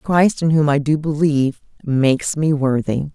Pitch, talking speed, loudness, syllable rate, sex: 150 Hz, 170 wpm, -17 LUFS, 4.6 syllables/s, female